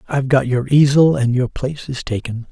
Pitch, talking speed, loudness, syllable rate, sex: 130 Hz, 215 wpm, -17 LUFS, 5.8 syllables/s, male